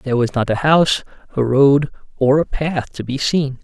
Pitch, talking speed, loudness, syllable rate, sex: 140 Hz, 215 wpm, -17 LUFS, 5.0 syllables/s, male